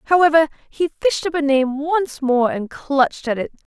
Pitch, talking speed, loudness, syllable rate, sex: 295 Hz, 190 wpm, -19 LUFS, 4.8 syllables/s, female